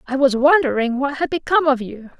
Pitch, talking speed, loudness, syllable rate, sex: 275 Hz, 220 wpm, -18 LUFS, 6.0 syllables/s, female